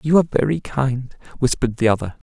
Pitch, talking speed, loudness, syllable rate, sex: 130 Hz, 180 wpm, -20 LUFS, 6.7 syllables/s, male